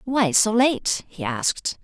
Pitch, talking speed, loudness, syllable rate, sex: 220 Hz, 165 wpm, -21 LUFS, 3.6 syllables/s, female